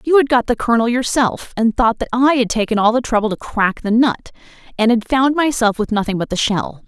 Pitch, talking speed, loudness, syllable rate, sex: 235 Hz, 245 wpm, -16 LUFS, 5.5 syllables/s, female